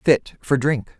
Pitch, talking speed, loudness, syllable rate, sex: 135 Hz, 180 wpm, -21 LUFS, 3.6 syllables/s, male